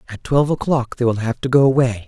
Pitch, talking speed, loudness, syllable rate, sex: 125 Hz, 260 wpm, -18 LUFS, 6.4 syllables/s, male